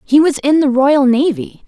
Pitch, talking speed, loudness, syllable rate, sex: 275 Hz, 215 wpm, -13 LUFS, 4.5 syllables/s, female